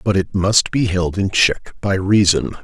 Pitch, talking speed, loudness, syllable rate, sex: 95 Hz, 205 wpm, -16 LUFS, 4.2 syllables/s, male